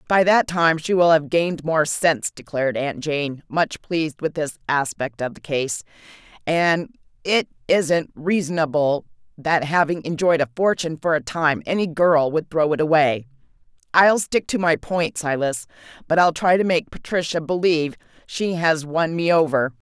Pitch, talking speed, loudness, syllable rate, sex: 160 Hz, 170 wpm, -20 LUFS, 4.7 syllables/s, female